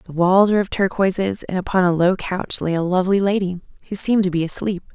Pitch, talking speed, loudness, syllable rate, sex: 185 Hz, 230 wpm, -19 LUFS, 6.3 syllables/s, female